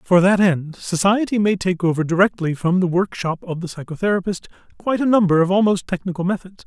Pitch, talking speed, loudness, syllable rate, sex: 185 Hz, 190 wpm, -19 LUFS, 5.9 syllables/s, male